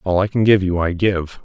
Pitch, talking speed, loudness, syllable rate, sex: 95 Hz, 290 wpm, -17 LUFS, 5.3 syllables/s, male